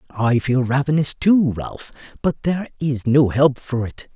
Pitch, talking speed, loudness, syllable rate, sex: 135 Hz, 175 wpm, -19 LUFS, 4.3 syllables/s, male